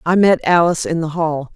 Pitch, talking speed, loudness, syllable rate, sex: 165 Hz, 230 wpm, -16 LUFS, 5.5 syllables/s, female